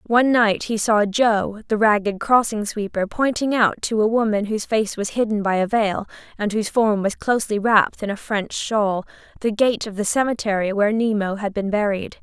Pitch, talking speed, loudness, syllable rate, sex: 215 Hz, 200 wpm, -20 LUFS, 5.2 syllables/s, female